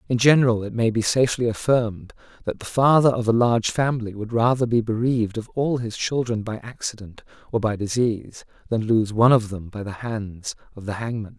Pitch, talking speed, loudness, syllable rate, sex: 115 Hz, 200 wpm, -22 LUFS, 5.7 syllables/s, male